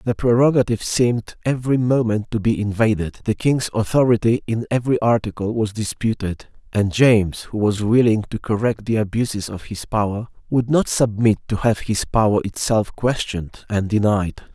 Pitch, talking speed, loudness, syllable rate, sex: 110 Hz, 160 wpm, -20 LUFS, 5.2 syllables/s, male